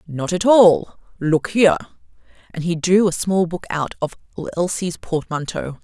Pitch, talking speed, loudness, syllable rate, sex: 175 Hz, 155 wpm, -19 LUFS, 4.5 syllables/s, female